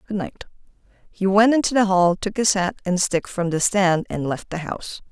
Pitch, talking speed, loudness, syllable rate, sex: 190 Hz, 225 wpm, -20 LUFS, 5.2 syllables/s, female